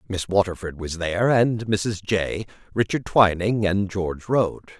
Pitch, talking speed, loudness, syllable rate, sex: 100 Hz, 150 wpm, -23 LUFS, 4.3 syllables/s, male